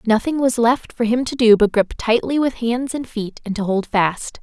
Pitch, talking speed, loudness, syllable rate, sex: 230 Hz, 245 wpm, -18 LUFS, 4.7 syllables/s, female